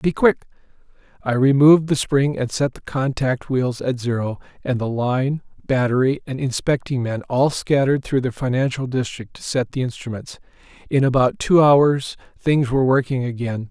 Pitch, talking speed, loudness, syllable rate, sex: 130 Hz, 165 wpm, -20 LUFS, 5.0 syllables/s, male